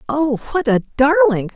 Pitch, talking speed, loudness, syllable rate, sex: 275 Hz, 155 wpm, -16 LUFS, 3.7 syllables/s, female